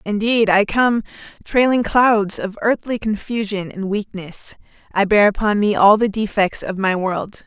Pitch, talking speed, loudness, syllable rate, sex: 210 Hz, 160 wpm, -18 LUFS, 4.3 syllables/s, female